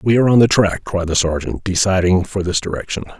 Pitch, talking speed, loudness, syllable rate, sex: 95 Hz, 225 wpm, -17 LUFS, 6.0 syllables/s, male